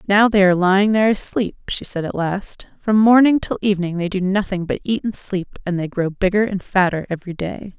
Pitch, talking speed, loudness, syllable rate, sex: 195 Hz, 225 wpm, -18 LUFS, 5.6 syllables/s, female